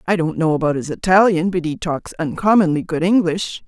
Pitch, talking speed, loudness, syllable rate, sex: 170 Hz, 195 wpm, -18 LUFS, 5.4 syllables/s, female